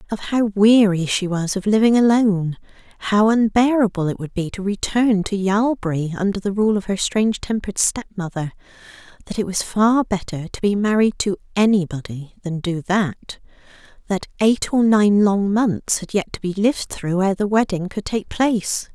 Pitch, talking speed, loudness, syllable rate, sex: 200 Hz, 180 wpm, -19 LUFS, 5.0 syllables/s, female